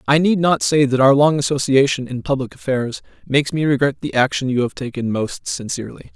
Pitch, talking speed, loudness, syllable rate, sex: 135 Hz, 205 wpm, -18 LUFS, 5.7 syllables/s, male